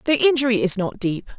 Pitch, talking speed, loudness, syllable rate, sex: 225 Hz, 215 wpm, -19 LUFS, 6.0 syllables/s, female